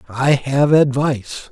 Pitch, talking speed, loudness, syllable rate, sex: 135 Hz, 120 wpm, -16 LUFS, 4.3 syllables/s, male